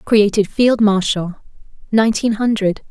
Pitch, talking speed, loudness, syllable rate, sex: 210 Hz, 105 wpm, -16 LUFS, 4.6 syllables/s, female